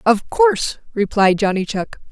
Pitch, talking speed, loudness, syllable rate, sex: 225 Hz, 140 wpm, -17 LUFS, 4.6 syllables/s, female